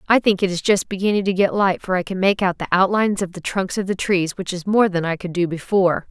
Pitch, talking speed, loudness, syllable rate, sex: 190 Hz, 295 wpm, -19 LUFS, 6.1 syllables/s, female